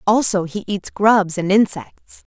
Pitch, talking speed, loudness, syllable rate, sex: 195 Hz, 155 wpm, -17 LUFS, 3.8 syllables/s, female